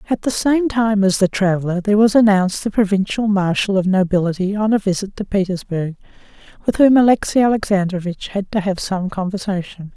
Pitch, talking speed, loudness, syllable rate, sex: 200 Hz, 175 wpm, -17 LUFS, 5.8 syllables/s, female